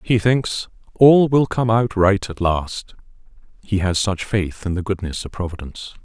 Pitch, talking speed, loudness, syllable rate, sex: 100 Hz, 180 wpm, -19 LUFS, 4.5 syllables/s, male